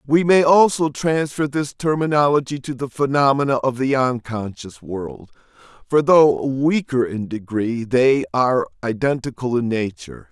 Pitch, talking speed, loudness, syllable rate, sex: 135 Hz, 135 wpm, -19 LUFS, 4.5 syllables/s, male